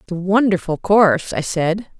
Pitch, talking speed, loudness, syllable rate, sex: 185 Hz, 180 wpm, -17 LUFS, 5.1 syllables/s, female